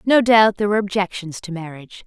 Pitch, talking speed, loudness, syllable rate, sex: 195 Hz, 205 wpm, -17 LUFS, 6.6 syllables/s, female